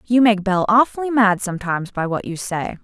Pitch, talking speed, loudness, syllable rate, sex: 205 Hz, 210 wpm, -18 LUFS, 6.0 syllables/s, female